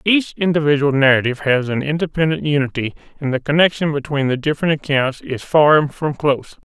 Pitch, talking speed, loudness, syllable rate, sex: 145 Hz, 160 wpm, -17 LUFS, 5.8 syllables/s, male